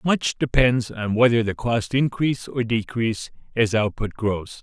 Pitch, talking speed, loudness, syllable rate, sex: 115 Hz, 155 wpm, -22 LUFS, 4.4 syllables/s, male